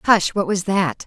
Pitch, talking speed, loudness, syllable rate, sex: 185 Hz, 225 wpm, -19 LUFS, 4.3 syllables/s, female